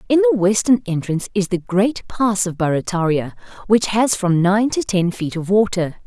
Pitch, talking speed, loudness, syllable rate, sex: 200 Hz, 190 wpm, -18 LUFS, 5.0 syllables/s, female